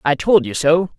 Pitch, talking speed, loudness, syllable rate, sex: 155 Hz, 245 wpm, -16 LUFS, 4.8 syllables/s, male